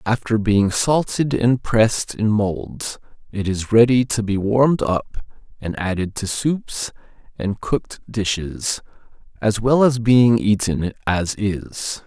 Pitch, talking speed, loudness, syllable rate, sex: 110 Hz, 140 wpm, -19 LUFS, 3.7 syllables/s, male